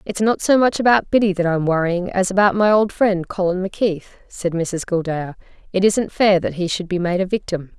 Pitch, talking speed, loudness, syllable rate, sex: 190 Hz, 225 wpm, -18 LUFS, 5.4 syllables/s, female